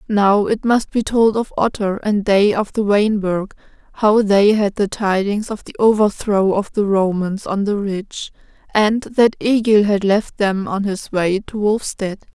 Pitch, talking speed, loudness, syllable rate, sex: 205 Hz, 190 wpm, -17 LUFS, 4.2 syllables/s, female